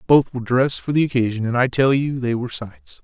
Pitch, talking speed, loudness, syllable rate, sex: 125 Hz, 255 wpm, -20 LUFS, 6.3 syllables/s, male